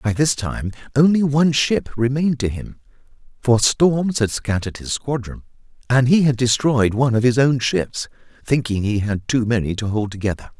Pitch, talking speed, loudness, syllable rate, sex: 125 Hz, 180 wpm, -19 LUFS, 5.2 syllables/s, male